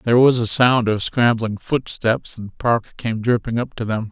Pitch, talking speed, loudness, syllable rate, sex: 115 Hz, 220 wpm, -19 LUFS, 4.4 syllables/s, male